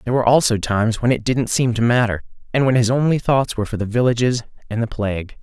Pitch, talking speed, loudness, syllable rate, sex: 120 Hz, 245 wpm, -18 LUFS, 6.8 syllables/s, male